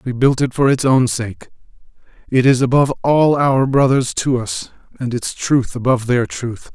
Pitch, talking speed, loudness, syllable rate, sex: 125 Hz, 185 wpm, -16 LUFS, 4.7 syllables/s, male